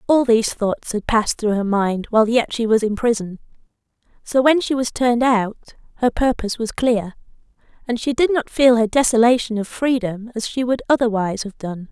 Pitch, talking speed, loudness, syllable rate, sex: 230 Hz, 195 wpm, -19 LUFS, 5.5 syllables/s, female